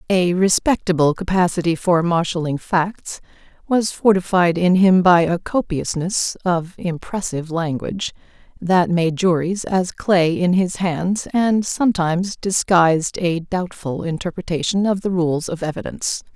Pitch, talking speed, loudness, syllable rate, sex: 180 Hz, 130 wpm, -19 LUFS, 4.4 syllables/s, female